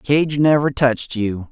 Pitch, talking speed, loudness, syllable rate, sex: 130 Hz, 160 wpm, -18 LUFS, 4.1 syllables/s, male